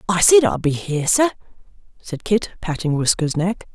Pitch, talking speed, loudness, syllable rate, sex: 185 Hz, 175 wpm, -18 LUFS, 5.2 syllables/s, female